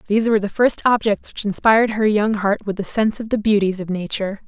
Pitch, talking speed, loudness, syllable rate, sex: 210 Hz, 240 wpm, -19 LUFS, 6.6 syllables/s, female